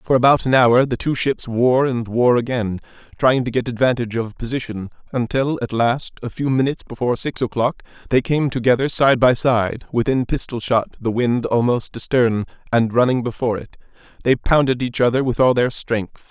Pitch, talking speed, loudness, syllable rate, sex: 125 Hz, 190 wpm, -19 LUFS, 5.3 syllables/s, male